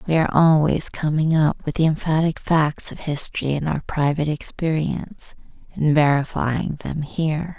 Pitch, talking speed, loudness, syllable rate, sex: 155 Hz, 150 wpm, -21 LUFS, 4.9 syllables/s, female